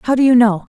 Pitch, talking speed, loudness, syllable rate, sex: 240 Hz, 320 wpm, -13 LUFS, 6.1 syllables/s, female